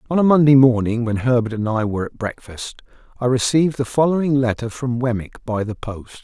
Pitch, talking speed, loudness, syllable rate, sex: 125 Hz, 200 wpm, -19 LUFS, 5.7 syllables/s, male